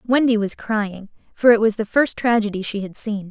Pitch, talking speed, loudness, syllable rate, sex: 220 Hz, 220 wpm, -19 LUFS, 5.1 syllables/s, female